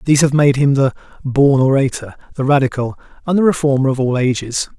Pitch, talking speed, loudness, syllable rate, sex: 135 Hz, 190 wpm, -15 LUFS, 6.0 syllables/s, male